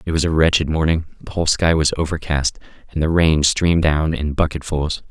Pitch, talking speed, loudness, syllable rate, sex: 80 Hz, 200 wpm, -18 LUFS, 5.6 syllables/s, male